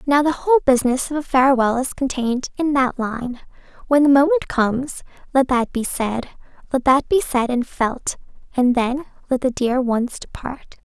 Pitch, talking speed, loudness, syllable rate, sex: 265 Hz, 180 wpm, -19 LUFS, 5.6 syllables/s, female